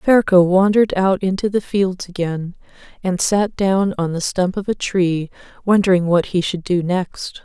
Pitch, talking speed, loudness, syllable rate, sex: 185 Hz, 175 wpm, -18 LUFS, 4.4 syllables/s, female